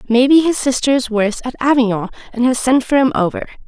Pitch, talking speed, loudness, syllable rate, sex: 250 Hz, 230 wpm, -15 LUFS, 6.3 syllables/s, female